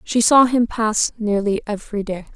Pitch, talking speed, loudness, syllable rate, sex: 215 Hz, 180 wpm, -18 LUFS, 4.8 syllables/s, female